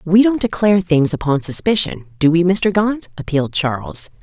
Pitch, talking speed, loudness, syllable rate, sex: 170 Hz, 170 wpm, -16 LUFS, 5.2 syllables/s, female